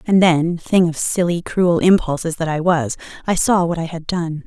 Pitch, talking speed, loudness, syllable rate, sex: 170 Hz, 215 wpm, -18 LUFS, 4.7 syllables/s, female